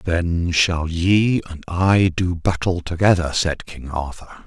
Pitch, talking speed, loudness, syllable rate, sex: 85 Hz, 150 wpm, -20 LUFS, 3.6 syllables/s, male